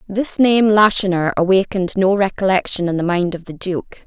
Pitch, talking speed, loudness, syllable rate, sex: 190 Hz, 175 wpm, -17 LUFS, 5.3 syllables/s, female